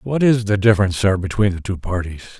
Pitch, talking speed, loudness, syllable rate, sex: 100 Hz, 225 wpm, -18 LUFS, 6.2 syllables/s, male